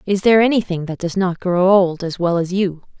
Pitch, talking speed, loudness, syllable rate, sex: 185 Hz, 240 wpm, -17 LUFS, 5.4 syllables/s, female